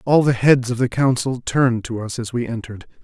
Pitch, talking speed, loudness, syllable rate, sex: 120 Hz, 235 wpm, -19 LUFS, 5.7 syllables/s, male